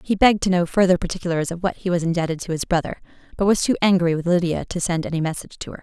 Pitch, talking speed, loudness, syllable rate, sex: 175 Hz, 270 wpm, -21 LUFS, 7.5 syllables/s, female